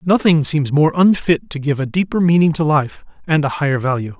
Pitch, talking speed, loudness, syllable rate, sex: 155 Hz, 215 wpm, -16 LUFS, 5.4 syllables/s, male